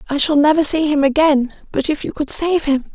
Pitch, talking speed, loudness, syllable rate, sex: 295 Hz, 245 wpm, -16 LUFS, 5.5 syllables/s, female